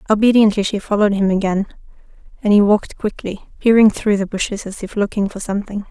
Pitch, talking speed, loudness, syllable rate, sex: 205 Hz, 185 wpm, -17 LUFS, 6.4 syllables/s, female